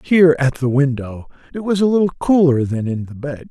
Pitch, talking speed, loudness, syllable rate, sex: 145 Hz, 220 wpm, -17 LUFS, 5.5 syllables/s, male